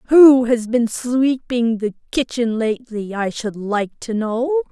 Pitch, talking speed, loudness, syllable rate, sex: 240 Hz, 155 wpm, -18 LUFS, 3.9 syllables/s, female